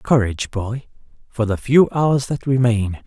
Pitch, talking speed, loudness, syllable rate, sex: 120 Hz, 155 wpm, -19 LUFS, 4.3 syllables/s, male